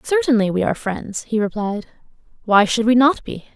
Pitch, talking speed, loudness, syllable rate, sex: 225 Hz, 185 wpm, -18 LUFS, 5.4 syllables/s, female